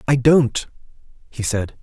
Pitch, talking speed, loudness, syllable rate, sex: 125 Hz, 130 wpm, -18 LUFS, 3.9 syllables/s, male